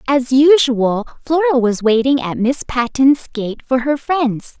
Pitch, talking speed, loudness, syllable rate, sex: 260 Hz, 155 wpm, -15 LUFS, 3.8 syllables/s, female